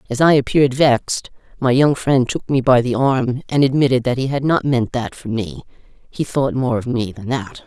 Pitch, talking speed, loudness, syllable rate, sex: 130 Hz, 225 wpm, -17 LUFS, 4.9 syllables/s, female